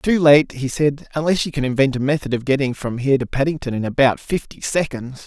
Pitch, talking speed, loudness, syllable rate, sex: 140 Hz, 230 wpm, -19 LUFS, 5.8 syllables/s, male